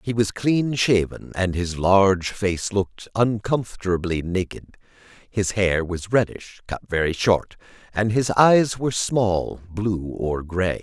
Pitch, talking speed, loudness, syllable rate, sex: 100 Hz, 145 wpm, -22 LUFS, 3.9 syllables/s, male